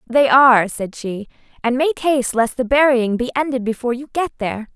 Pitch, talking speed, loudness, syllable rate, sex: 250 Hz, 200 wpm, -17 LUFS, 5.6 syllables/s, female